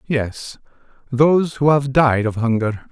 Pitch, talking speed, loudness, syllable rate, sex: 130 Hz, 145 wpm, -17 LUFS, 4.1 syllables/s, male